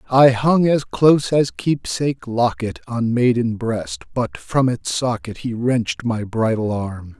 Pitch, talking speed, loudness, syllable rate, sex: 120 Hz, 150 wpm, -19 LUFS, 4.0 syllables/s, male